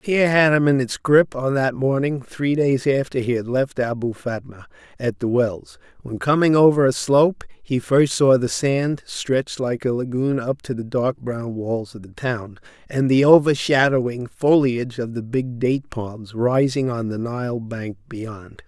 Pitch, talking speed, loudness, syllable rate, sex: 130 Hz, 185 wpm, -20 LUFS, 4.2 syllables/s, male